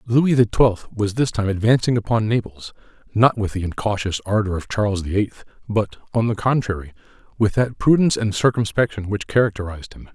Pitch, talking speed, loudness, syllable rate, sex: 105 Hz, 175 wpm, -20 LUFS, 5.6 syllables/s, male